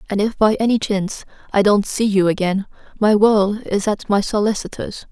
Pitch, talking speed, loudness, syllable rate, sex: 205 Hz, 190 wpm, -18 LUFS, 5.1 syllables/s, female